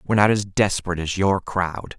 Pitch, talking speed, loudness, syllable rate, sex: 95 Hz, 210 wpm, -21 LUFS, 5.9 syllables/s, male